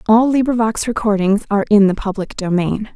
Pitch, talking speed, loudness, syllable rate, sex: 210 Hz, 160 wpm, -16 LUFS, 5.7 syllables/s, female